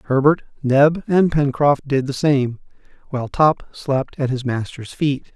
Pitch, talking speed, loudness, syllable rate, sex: 140 Hz, 155 wpm, -19 LUFS, 4.1 syllables/s, male